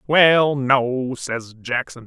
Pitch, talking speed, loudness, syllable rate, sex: 130 Hz, 115 wpm, -19 LUFS, 2.7 syllables/s, male